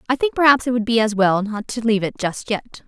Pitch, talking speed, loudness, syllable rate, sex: 225 Hz, 290 wpm, -19 LUFS, 6.1 syllables/s, female